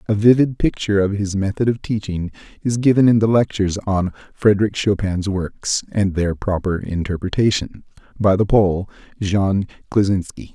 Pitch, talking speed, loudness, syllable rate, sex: 100 Hz, 150 wpm, -19 LUFS, 4.9 syllables/s, male